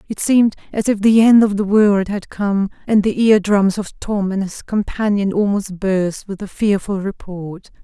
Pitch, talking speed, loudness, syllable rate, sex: 200 Hz, 200 wpm, -17 LUFS, 4.4 syllables/s, female